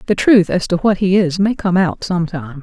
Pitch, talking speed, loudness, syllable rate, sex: 180 Hz, 275 wpm, -15 LUFS, 4.9 syllables/s, female